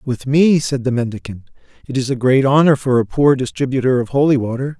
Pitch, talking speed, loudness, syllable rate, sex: 130 Hz, 215 wpm, -16 LUFS, 5.8 syllables/s, male